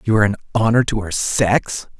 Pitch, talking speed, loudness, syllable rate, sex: 110 Hz, 210 wpm, -18 LUFS, 5.5 syllables/s, male